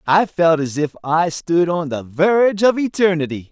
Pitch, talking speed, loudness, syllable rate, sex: 170 Hz, 190 wpm, -17 LUFS, 4.6 syllables/s, male